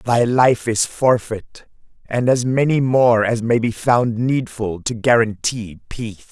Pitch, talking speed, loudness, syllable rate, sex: 115 Hz, 150 wpm, -17 LUFS, 3.8 syllables/s, male